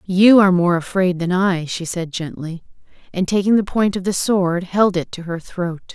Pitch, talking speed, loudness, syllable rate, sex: 180 Hz, 210 wpm, -18 LUFS, 4.7 syllables/s, female